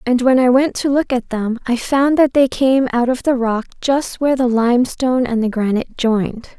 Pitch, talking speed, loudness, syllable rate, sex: 250 Hz, 230 wpm, -16 LUFS, 5.3 syllables/s, female